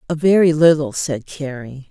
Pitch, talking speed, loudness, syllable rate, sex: 150 Hz, 155 wpm, -16 LUFS, 4.6 syllables/s, female